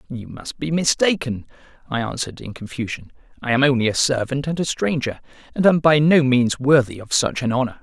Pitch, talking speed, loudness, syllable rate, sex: 135 Hz, 200 wpm, -19 LUFS, 5.8 syllables/s, male